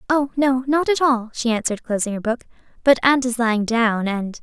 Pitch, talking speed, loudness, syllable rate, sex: 245 Hz, 215 wpm, -20 LUFS, 5.4 syllables/s, female